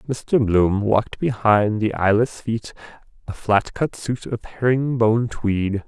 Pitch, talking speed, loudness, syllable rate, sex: 110 Hz, 135 wpm, -20 LUFS, 3.9 syllables/s, male